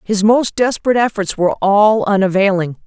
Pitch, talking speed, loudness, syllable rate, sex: 205 Hz, 145 wpm, -14 LUFS, 5.6 syllables/s, female